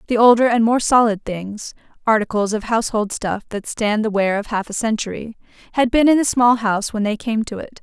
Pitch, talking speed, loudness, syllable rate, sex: 220 Hz, 205 wpm, -18 LUFS, 5.6 syllables/s, female